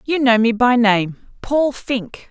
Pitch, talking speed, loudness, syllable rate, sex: 240 Hz, 155 wpm, -17 LUFS, 3.6 syllables/s, female